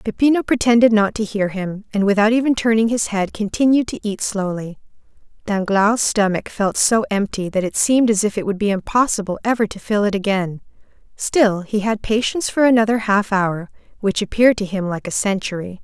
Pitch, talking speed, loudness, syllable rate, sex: 210 Hz, 190 wpm, -18 LUFS, 5.5 syllables/s, female